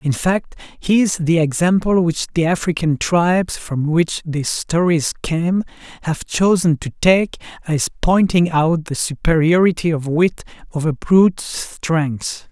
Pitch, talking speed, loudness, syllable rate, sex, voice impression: 165 Hz, 140 wpm, -17 LUFS, 4.0 syllables/s, male, masculine, adult-like, slightly bright, unique, kind